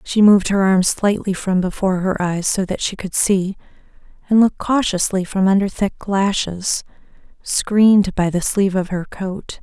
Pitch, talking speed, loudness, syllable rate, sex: 195 Hz, 175 wpm, -18 LUFS, 4.8 syllables/s, female